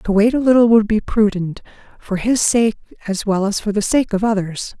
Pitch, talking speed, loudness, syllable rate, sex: 215 Hz, 225 wpm, -17 LUFS, 5.2 syllables/s, female